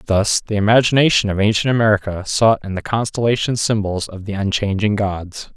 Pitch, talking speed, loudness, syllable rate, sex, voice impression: 105 Hz, 160 wpm, -17 LUFS, 5.4 syllables/s, male, masculine, middle-aged, tensed, powerful, bright, clear, cool, intellectual, calm, friendly, reassuring, wild, kind